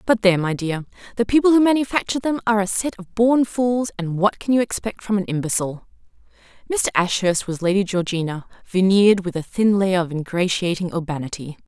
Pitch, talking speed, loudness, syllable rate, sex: 200 Hz, 185 wpm, -20 LUFS, 5.9 syllables/s, female